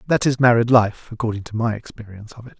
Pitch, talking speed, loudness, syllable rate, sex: 115 Hz, 230 wpm, -19 LUFS, 6.7 syllables/s, male